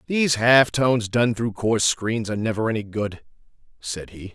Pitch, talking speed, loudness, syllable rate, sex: 110 Hz, 180 wpm, -21 LUFS, 5.3 syllables/s, male